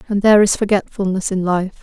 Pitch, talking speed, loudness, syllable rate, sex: 195 Hz, 195 wpm, -16 LUFS, 6.1 syllables/s, female